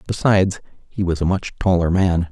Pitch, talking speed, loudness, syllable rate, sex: 90 Hz, 180 wpm, -19 LUFS, 5.5 syllables/s, male